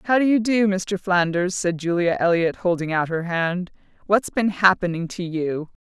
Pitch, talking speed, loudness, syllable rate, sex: 185 Hz, 175 wpm, -21 LUFS, 4.4 syllables/s, female